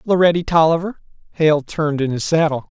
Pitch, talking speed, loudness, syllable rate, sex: 160 Hz, 155 wpm, -17 LUFS, 6.0 syllables/s, male